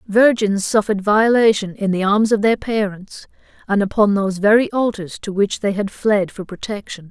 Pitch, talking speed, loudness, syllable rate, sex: 205 Hz, 175 wpm, -17 LUFS, 5.0 syllables/s, female